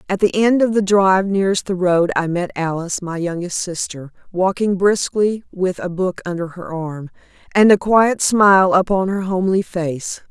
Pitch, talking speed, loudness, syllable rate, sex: 185 Hz, 180 wpm, -17 LUFS, 4.9 syllables/s, female